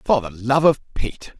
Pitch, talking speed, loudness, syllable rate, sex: 125 Hz, 215 wpm, -20 LUFS, 4.8 syllables/s, male